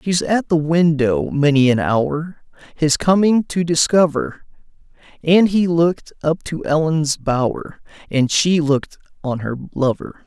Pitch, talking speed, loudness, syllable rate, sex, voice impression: 155 Hz, 140 wpm, -17 LUFS, 3.8 syllables/s, male, masculine, adult-like, tensed, clear, fluent, intellectual, friendly, unique, kind, slightly modest